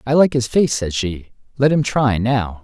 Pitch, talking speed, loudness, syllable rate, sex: 125 Hz, 225 wpm, -18 LUFS, 4.4 syllables/s, male